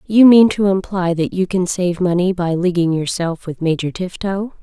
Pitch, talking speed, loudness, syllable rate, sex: 180 Hz, 195 wpm, -16 LUFS, 4.7 syllables/s, female